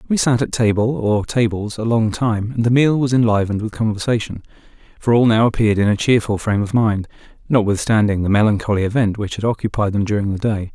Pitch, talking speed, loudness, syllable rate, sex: 110 Hz, 195 wpm, -17 LUFS, 6.2 syllables/s, male